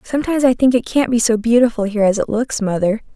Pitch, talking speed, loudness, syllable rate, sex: 230 Hz, 250 wpm, -16 LUFS, 6.8 syllables/s, female